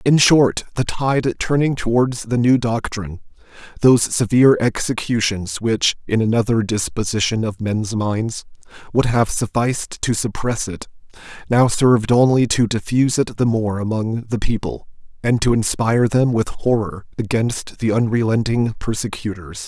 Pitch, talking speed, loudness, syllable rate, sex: 115 Hz, 140 wpm, -18 LUFS, 4.7 syllables/s, male